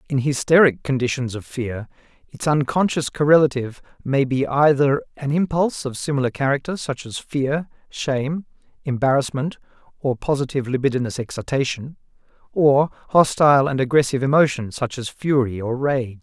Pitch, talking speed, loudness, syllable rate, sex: 135 Hz, 130 wpm, -20 LUFS, 5.4 syllables/s, male